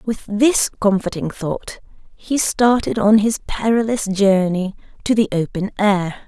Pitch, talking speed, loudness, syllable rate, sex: 205 Hz, 135 wpm, -18 LUFS, 4.1 syllables/s, female